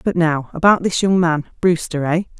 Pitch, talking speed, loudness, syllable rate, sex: 170 Hz, 150 wpm, -17 LUFS, 5.1 syllables/s, female